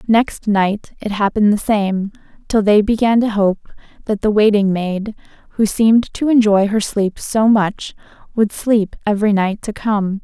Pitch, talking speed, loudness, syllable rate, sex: 210 Hz, 170 wpm, -16 LUFS, 4.4 syllables/s, female